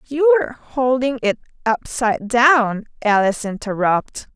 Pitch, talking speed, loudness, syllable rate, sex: 240 Hz, 95 wpm, -18 LUFS, 4.4 syllables/s, female